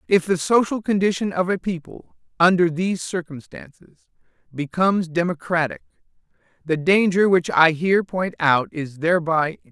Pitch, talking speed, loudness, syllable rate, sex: 175 Hz, 135 wpm, -20 LUFS, 5.2 syllables/s, male